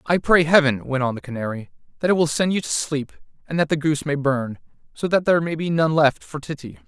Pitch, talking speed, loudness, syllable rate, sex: 150 Hz, 255 wpm, -21 LUFS, 6.0 syllables/s, male